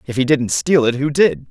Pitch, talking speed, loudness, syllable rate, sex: 130 Hz, 320 wpm, -16 LUFS, 5.8 syllables/s, male